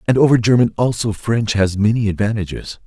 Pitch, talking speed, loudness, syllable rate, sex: 110 Hz, 165 wpm, -17 LUFS, 5.8 syllables/s, male